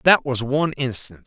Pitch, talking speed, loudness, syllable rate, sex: 130 Hz, 190 wpm, -21 LUFS, 6.3 syllables/s, male